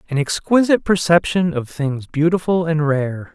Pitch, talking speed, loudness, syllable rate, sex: 160 Hz, 145 wpm, -18 LUFS, 4.8 syllables/s, male